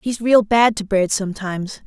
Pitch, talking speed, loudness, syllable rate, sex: 210 Hz, 195 wpm, -18 LUFS, 5.2 syllables/s, female